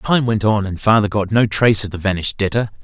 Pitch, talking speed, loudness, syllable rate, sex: 105 Hz, 255 wpm, -17 LUFS, 6.3 syllables/s, male